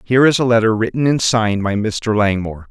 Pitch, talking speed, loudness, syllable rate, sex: 110 Hz, 220 wpm, -16 LUFS, 6.1 syllables/s, male